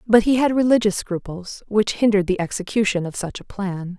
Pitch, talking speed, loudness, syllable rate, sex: 200 Hz, 195 wpm, -20 LUFS, 5.5 syllables/s, female